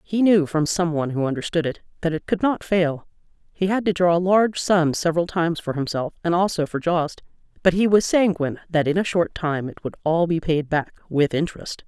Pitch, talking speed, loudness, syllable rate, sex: 170 Hz, 220 wpm, -21 LUFS, 5.6 syllables/s, female